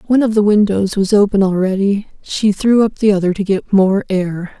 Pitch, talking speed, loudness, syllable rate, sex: 200 Hz, 210 wpm, -14 LUFS, 5.2 syllables/s, female